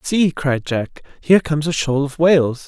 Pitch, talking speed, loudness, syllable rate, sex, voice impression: 150 Hz, 200 wpm, -17 LUFS, 5.1 syllables/s, male, masculine, adult-like, tensed, hard, clear, fluent, intellectual, sincere, slightly wild, strict